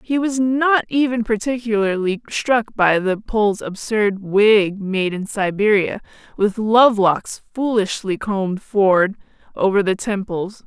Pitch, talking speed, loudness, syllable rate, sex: 210 Hz, 130 wpm, -18 LUFS, 4.0 syllables/s, female